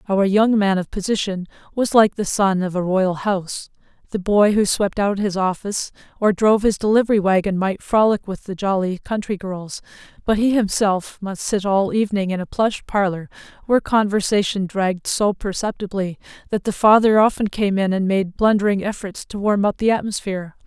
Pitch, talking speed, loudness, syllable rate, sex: 200 Hz, 185 wpm, -19 LUFS, 5.3 syllables/s, female